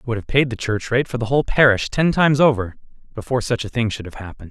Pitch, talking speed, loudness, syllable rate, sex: 120 Hz, 280 wpm, -19 LUFS, 7.2 syllables/s, male